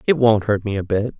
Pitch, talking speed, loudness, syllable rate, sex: 110 Hz, 300 wpm, -19 LUFS, 5.8 syllables/s, male